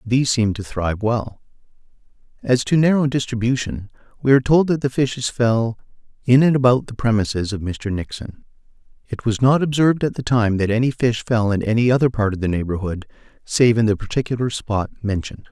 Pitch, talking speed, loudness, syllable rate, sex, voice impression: 115 Hz, 185 wpm, -19 LUFS, 5.8 syllables/s, male, very masculine, very adult-like, middle-aged, very thick, relaxed, slightly weak, slightly dark, soft, muffled, slightly fluent, slightly raspy, cool, very intellectual, very sincere, very calm, very mature, very friendly, reassuring, slightly unique, elegant, very sweet, slightly lively, very kind, slightly modest